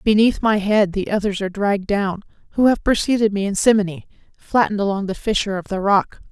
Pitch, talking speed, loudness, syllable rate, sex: 205 Hz, 200 wpm, -19 LUFS, 6.2 syllables/s, female